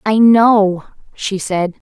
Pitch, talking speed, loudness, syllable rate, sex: 205 Hz, 125 wpm, -13 LUFS, 2.9 syllables/s, female